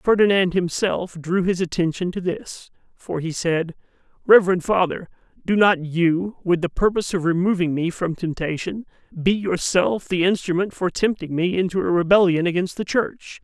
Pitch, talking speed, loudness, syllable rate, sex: 180 Hz, 160 wpm, -21 LUFS, 4.9 syllables/s, male